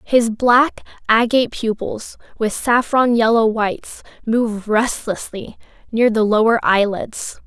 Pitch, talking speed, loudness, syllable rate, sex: 225 Hz, 115 wpm, -17 LUFS, 4.0 syllables/s, female